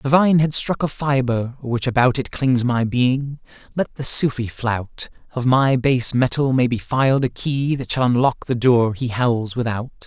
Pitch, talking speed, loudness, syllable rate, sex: 125 Hz, 190 wpm, -19 LUFS, 4.3 syllables/s, male